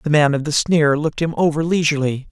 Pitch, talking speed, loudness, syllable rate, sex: 150 Hz, 235 wpm, -18 LUFS, 6.4 syllables/s, male